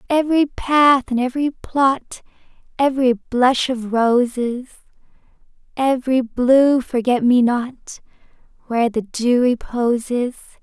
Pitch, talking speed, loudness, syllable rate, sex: 255 Hz, 100 wpm, -18 LUFS, 3.9 syllables/s, female